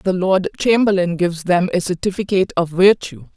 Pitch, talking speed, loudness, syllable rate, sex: 180 Hz, 160 wpm, -17 LUFS, 5.5 syllables/s, female